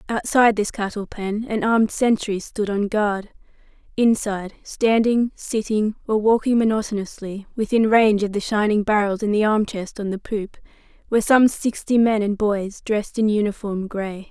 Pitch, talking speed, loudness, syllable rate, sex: 215 Hz, 165 wpm, -21 LUFS, 4.9 syllables/s, female